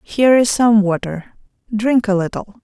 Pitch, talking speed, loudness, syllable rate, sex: 215 Hz, 160 wpm, -15 LUFS, 4.6 syllables/s, female